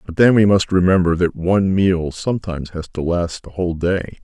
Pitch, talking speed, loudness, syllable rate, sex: 90 Hz, 215 wpm, -18 LUFS, 5.7 syllables/s, male